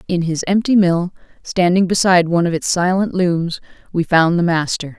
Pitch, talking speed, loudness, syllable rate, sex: 175 Hz, 180 wpm, -16 LUFS, 5.5 syllables/s, female